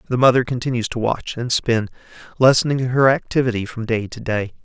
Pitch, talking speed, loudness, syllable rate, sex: 120 Hz, 180 wpm, -19 LUFS, 5.8 syllables/s, male